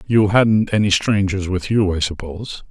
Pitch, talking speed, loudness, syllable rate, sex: 100 Hz, 175 wpm, -18 LUFS, 4.7 syllables/s, male